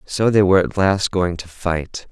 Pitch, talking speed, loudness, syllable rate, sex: 95 Hz, 225 wpm, -18 LUFS, 4.5 syllables/s, male